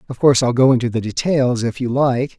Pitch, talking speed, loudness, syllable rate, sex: 125 Hz, 250 wpm, -17 LUFS, 6.3 syllables/s, male